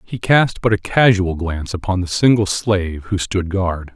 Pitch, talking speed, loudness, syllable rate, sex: 95 Hz, 195 wpm, -17 LUFS, 4.7 syllables/s, male